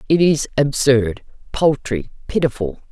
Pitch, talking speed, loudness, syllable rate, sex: 135 Hz, 105 wpm, -18 LUFS, 4.3 syllables/s, female